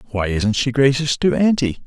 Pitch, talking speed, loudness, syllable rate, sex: 130 Hz, 195 wpm, -18 LUFS, 5.2 syllables/s, male